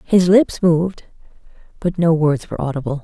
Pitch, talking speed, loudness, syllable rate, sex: 165 Hz, 160 wpm, -17 LUFS, 5.5 syllables/s, female